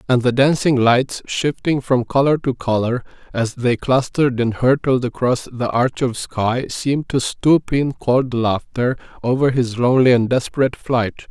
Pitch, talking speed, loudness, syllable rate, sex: 125 Hz, 165 wpm, -18 LUFS, 4.5 syllables/s, male